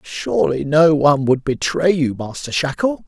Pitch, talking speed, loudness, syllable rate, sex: 145 Hz, 155 wpm, -17 LUFS, 4.8 syllables/s, male